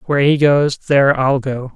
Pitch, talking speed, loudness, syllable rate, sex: 135 Hz, 205 wpm, -15 LUFS, 5.0 syllables/s, male